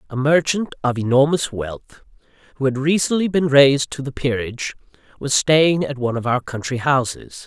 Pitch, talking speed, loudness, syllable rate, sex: 135 Hz, 170 wpm, -19 LUFS, 5.2 syllables/s, male